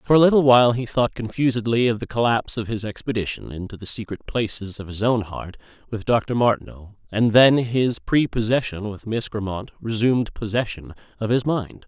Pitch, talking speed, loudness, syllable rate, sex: 115 Hz, 180 wpm, -21 LUFS, 5.4 syllables/s, male